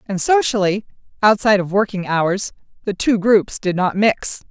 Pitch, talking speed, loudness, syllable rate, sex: 200 Hz, 160 wpm, -17 LUFS, 4.7 syllables/s, female